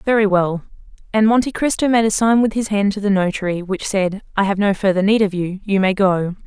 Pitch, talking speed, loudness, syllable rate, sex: 200 Hz, 240 wpm, -17 LUFS, 5.6 syllables/s, female